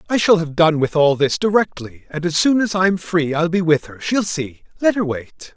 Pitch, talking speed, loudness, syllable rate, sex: 170 Hz, 250 wpm, -18 LUFS, 4.9 syllables/s, male